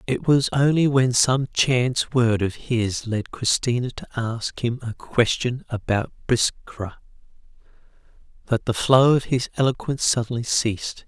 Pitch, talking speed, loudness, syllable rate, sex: 120 Hz, 140 wpm, -22 LUFS, 4.3 syllables/s, male